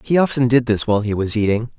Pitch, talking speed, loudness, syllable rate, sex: 120 Hz, 270 wpm, -18 LUFS, 6.7 syllables/s, male